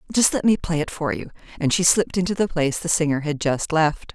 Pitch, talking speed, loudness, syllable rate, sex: 165 Hz, 260 wpm, -21 LUFS, 6.1 syllables/s, female